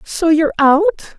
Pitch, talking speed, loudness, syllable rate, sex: 305 Hz, 150 wpm, -14 LUFS, 5.8 syllables/s, female